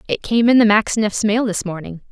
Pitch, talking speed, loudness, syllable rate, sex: 215 Hz, 225 wpm, -16 LUFS, 5.9 syllables/s, female